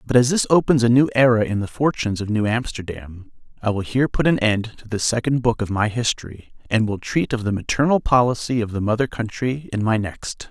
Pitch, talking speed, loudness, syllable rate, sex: 115 Hz, 230 wpm, -20 LUFS, 5.7 syllables/s, male